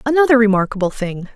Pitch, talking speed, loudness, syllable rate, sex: 225 Hz, 135 wpm, -16 LUFS, 6.8 syllables/s, female